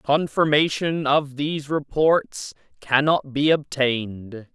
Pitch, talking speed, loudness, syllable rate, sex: 145 Hz, 90 wpm, -21 LUFS, 3.6 syllables/s, male